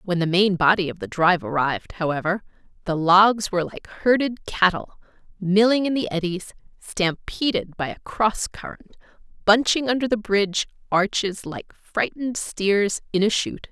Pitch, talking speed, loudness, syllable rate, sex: 195 Hz, 155 wpm, -22 LUFS, 5.0 syllables/s, female